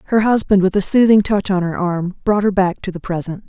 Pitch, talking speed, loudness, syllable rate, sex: 195 Hz, 260 wpm, -16 LUFS, 5.7 syllables/s, female